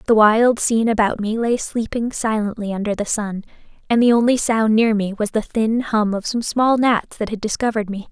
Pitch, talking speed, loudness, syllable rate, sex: 220 Hz, 215 wpm, -19 LUFS, 5.2 syllables/s, female